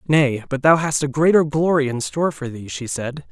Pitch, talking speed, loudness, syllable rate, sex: 145 Hz, 235 wpm, -19 LUFS, 5.2 syllables/s, male